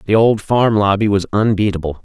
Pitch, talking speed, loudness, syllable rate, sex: 105 Hz, 175 wpm, -15 LUFS, 5.6 syllables/s, male